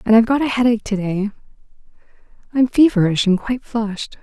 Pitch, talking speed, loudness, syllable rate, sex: 225 Hz, 170 wpm, -18 LUFS, 6.6 syllables/s, female